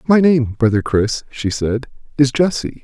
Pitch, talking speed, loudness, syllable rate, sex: 130 Hz, 170 wpm, -17 LUFS, 4.4 syllables/s, male